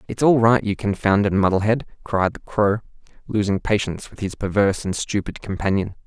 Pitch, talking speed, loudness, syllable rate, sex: 105 Hz, 170 wpm, -21 LUFS, 5.7 syllables/s, male